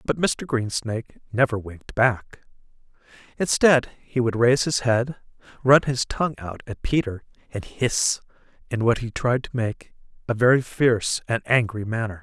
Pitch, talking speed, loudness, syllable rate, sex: 120 Hz, 155 wpm, -23 LUFS, 4.8 syllables/s, male